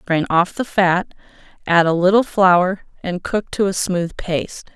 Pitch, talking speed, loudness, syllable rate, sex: 185 Hz, 175 wpm, -18 LUFS, 4.2 syllables/s, female